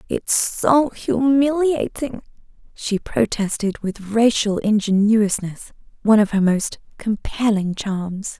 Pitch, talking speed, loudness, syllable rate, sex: 220 Hz, 95 wpm, -19 LUFS, 3.6 syllables/s, female